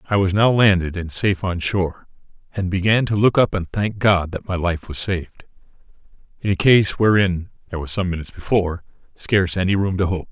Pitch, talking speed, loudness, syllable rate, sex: 95 Hz, 205 wpm, -19 LUFS, 5.9 syllables/s, male